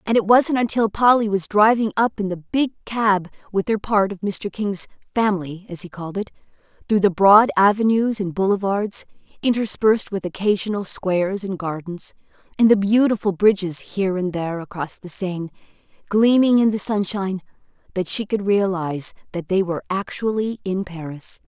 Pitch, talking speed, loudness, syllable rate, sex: 200 Hz, 165 wpm, -20 LUFS, 5.2 syllables/s, female